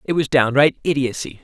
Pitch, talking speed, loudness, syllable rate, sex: 140 Hz, 165 wpm, -18 LUFS, 5.6 syllables/s, male